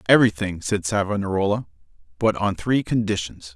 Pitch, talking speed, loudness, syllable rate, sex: 100 Hz, 120 wpm, -22 LUFS, 5.6 syllables/s, male